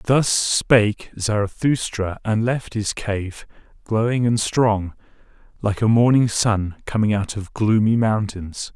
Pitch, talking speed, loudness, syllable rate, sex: 110 Hz, 130 wpm, -20 LUFS, 3.7 syllables/s, male